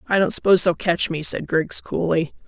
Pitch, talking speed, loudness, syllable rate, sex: 170 Hz, 220 wpm, -20 LUFS, 5.4 syllables/s, female